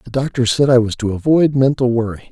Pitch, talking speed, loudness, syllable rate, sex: 125 Hz, 235 wpm, -15 LUFS, 5.9 syllables/s, male